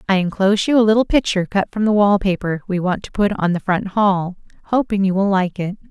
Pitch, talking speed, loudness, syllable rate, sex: 195 Hz, 245 wpm, -18 LUFS, 6.0 syllables/s, female